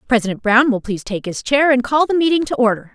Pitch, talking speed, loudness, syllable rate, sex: 245 Hz, 265 wpm, -16 LUFS, 6.5 syllables/s, female